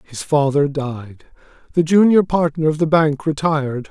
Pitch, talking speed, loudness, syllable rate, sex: 150 Hz, 155 wpm, -17 LUFS, 4.6 syllables/s, male